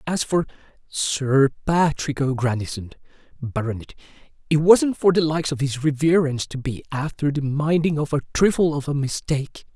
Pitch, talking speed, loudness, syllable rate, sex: 145 Hz, 155 wpm, -21 LUFS, 5.2 syllables/s, male